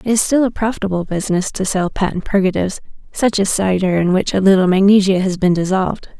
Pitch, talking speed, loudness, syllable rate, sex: 190 Hz, 205 wpm, -16 LUFS, 6.3 syllables/s, female